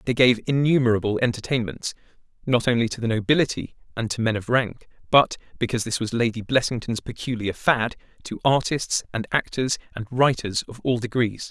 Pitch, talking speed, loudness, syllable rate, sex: 120 Hz, 150 wpm, -23 LUFS, 5.6 syllables/s, male